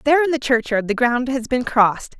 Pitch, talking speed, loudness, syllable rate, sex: 250 Hz, 245 wpm, -18 LUFS, 5.8 syllables/s, female